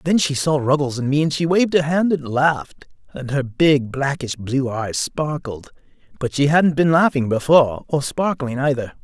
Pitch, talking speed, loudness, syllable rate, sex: 140 Hz, 195 wpm, -19 LUFS, 4.8 syllables/s, male